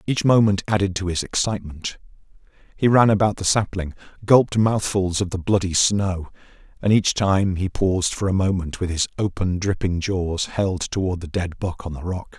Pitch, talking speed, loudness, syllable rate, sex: 95 Hz, 185 wpm, -21 LUFS, 5.1 syllables/s, male